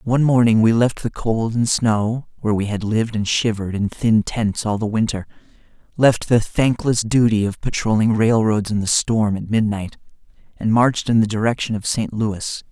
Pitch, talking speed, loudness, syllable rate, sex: 110 Hz, 190 wpm, -19 LUFS, 5.0 syllables/s, male